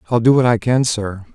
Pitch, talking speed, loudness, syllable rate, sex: 115 Hz, 270 wpm, -16 LUFS, 5.7 syllables/s, male